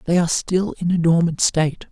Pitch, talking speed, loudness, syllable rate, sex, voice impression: 170 Hz, 220 wpm, -19 LUFS, 5.5 syllables/s, male, masculine, adult-like, slightly thick, slightly tensed, weak, slightly dark, soft, muffled, fluent, slightly raspy, slightly cool, intellectual, slightly refreshing, sincere, calm, friendly, reassuring, very unique, very elegant, very sweet, lively, very kind, modest